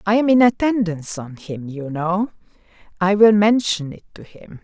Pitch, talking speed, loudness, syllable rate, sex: 195 Hz, 170 wpm, -18 LUFS, 4.6 syllables/s, female